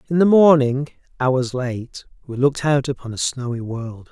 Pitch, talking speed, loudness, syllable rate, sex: 135 Hz, 175 wpm, -19 LUFS, 4.7 syllables/s, male